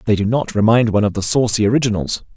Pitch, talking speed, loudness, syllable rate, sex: 110 Hz, 230 wpm, -16 LUFS, 7.0 syllables/s, male